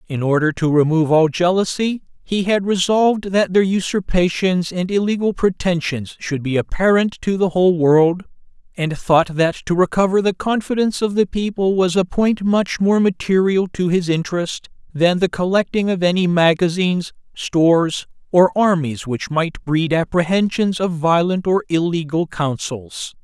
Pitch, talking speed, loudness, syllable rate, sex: 180 Hz, 150 wpm, -18 LUFS, 4.7 syllables/s, male